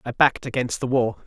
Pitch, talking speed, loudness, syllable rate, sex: 125 Hz, 235 wpm, -22 LUFS, 6.2 syllables/s, male